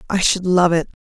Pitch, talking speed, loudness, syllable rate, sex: 180 Hz, 235 wpm, -17 LUFS, 5.6 syllables/s, female